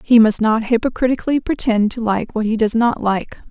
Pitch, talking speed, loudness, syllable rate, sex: 225 Hz, 205 wpm, -17 LUFS, 5.6 syllables/s, female